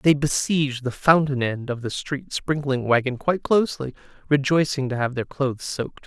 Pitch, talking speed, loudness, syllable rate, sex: 140 Hz, 180 wpm, -23 LUFS, 5.3 syllables/s, male